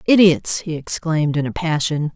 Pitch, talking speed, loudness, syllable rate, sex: 160 Hz, 165 wpm, -19 LUFS, 5.0 syllables/s, female